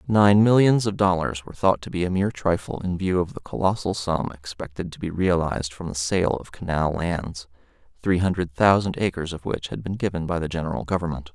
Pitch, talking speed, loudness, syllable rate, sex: 90 Hz, 210 wpm, -23 LUFS, 5.6 syllables/s, male